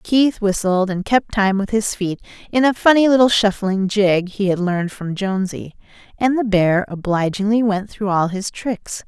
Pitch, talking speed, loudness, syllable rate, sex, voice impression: 200 Hz, 185 wpm, -18 LUFS, 4.7 syllables/s, female, feminine, adult-like, tensed, powerful, bright, clear, slightly fluent, intellectual, slightly friendly, elegant, lively, slightly sharp